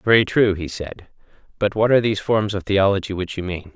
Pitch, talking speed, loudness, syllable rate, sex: 100 Hz, 225 wpm, -20 LUFS, 5.8 syllables/s, male